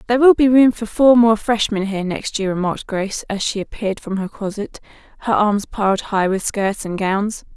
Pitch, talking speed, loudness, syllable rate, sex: 210 Hz, 215 wpm, -18 LUFS, 5.5 syllables/s, female